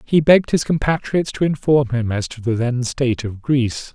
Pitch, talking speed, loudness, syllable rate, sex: 130 Hz, 215 wpm, -18 LUFS, 5.2 syllables/s, male